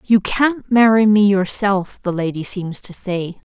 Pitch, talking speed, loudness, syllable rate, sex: 200 Hz, 170 wpm, -17 LUFS, 4.0 syllables/s, female